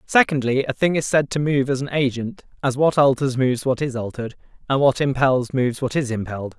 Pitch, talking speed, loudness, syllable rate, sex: 135 Hz, 220 wpm, -20 LUFS, 5.9 syllables/s, male